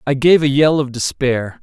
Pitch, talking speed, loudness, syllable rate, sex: 140 Hz, 220 wpm, -15 LUFS, 4.7 syllables/s, male